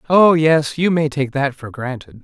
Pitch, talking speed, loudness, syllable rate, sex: 145 Hz, 215 wpm, -17 LUFS, 4.4 syllables/s, male